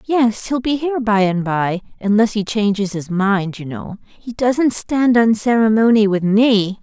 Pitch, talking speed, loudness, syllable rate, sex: 215 Hz, 185 wpm, -16 LUFS, 4.2 syllables/s, female